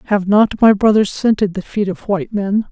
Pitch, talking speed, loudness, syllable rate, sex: 205 Hz, 220 wpm, -15 LUFS, 5.2 syllables/s, female